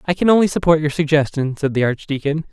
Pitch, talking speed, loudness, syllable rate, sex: 155 Hz, 215 wpm, -17 LUFS, 6.3 syllables/s, male